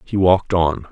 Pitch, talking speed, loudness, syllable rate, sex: 85 Hz, 195 wpm, -17 LUFS, 5.1 syllables/s, male